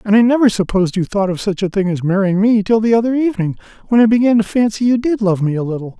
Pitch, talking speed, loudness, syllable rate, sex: 210 Hz, 280 wpm, -15 LUFS, 6.8 syllables/s, male